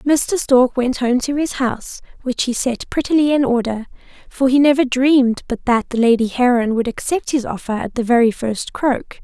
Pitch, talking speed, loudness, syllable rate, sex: 250 Hz, 200 wpm, -17 LUFS, 5.0 syllables/s, female